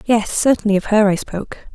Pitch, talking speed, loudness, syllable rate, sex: 210 Hz, 205 wpm, -16 LUFS, 5.6 syllables/s, female